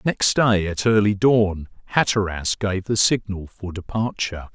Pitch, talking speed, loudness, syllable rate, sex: 100 Hz, 145 wpm, -20 LUFS, 4.3 syllables/s, male